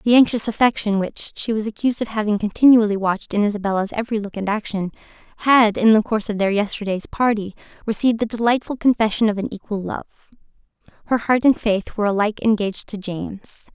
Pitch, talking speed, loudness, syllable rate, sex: 215 Hz, 185 wpm, -20 LUFS, 6.5 syllables/s, female